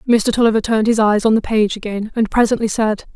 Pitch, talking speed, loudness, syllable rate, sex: 220 Hz, 230 wpm, -16 LUFS, 6.3 syllables/s, female